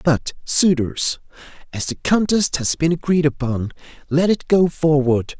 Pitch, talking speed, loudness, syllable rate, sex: 155 Hz, 145 wpm, -19 LUFS, 4.2 syllables/s, male